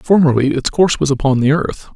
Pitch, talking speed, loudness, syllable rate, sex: 145 Hz, 215 wpm, -15 LUFS, 6.2 syllables/s, male